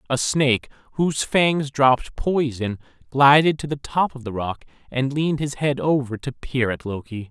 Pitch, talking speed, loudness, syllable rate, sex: 135 Hz, 180 wpm, -21 LUFS, 4.8 syllables/s, male